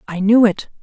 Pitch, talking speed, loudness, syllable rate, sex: 210 Hz, 220 wpm, -14 LUFS, 5.3 syllables/s, female